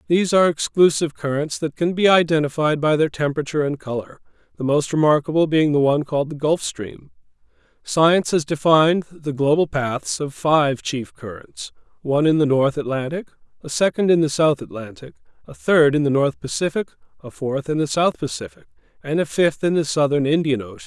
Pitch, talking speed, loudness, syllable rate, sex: 150 Hz, 185 wpm, -19 LUFS, 5.6 syllables/s, male